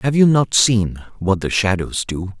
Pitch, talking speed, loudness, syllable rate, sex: 110 Hz, 200 wpm, -17 LUFS, 4.1 syllables/s, male